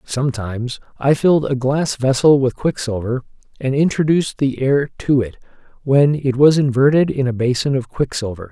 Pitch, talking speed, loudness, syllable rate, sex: 135 Hz, 160 wpm, -17 LUFS, 5.2 syllables/s, male